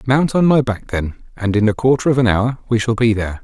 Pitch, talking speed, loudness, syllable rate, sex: 115 Hz, 280 wpm, -16 LUFS, 5.9 syllables/s, male